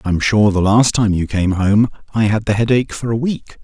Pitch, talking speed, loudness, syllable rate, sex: 110 Hz, 250 wpm, -16 LUFS, 5.2 syllables/s, male